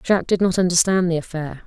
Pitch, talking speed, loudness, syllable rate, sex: 175 Hz, 215 wpm, -19 LUFS, 6.2 syllables/s, female